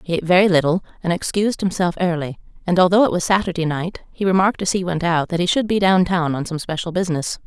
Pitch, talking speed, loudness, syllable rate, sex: 175 Hz, 240 wpm, -19 LUFS, 6.7 syllables/s, female